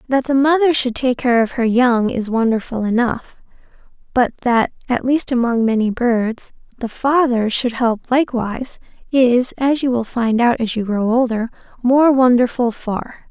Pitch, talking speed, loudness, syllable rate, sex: 245 Hz, 165 wpm, -17 LUFS, 3.5 syllables/s, female